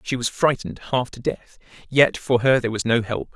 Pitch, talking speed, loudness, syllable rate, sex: 125 Hz, 235 wpm, -21 LUFS, 5.7 syllables/s, male